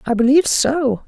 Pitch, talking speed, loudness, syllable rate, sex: 265 Hz, 170 wpm, -15 LUFS, 5.4 syllables/s, female